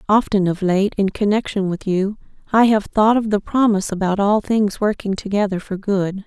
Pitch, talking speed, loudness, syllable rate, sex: 200 Hz, 190 wpm, -18 LUFS, 5.1 syllables/s, female